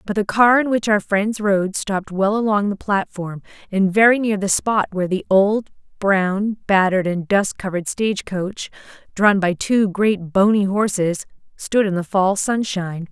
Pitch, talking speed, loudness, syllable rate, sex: 200 Hz, 180 wpm, -19 LUFS, 4.6 syllables/s, female